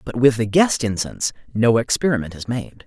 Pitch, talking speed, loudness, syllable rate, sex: 120 Hz, 190 wpm, -20 LUFS, 5.5 syllables/s, male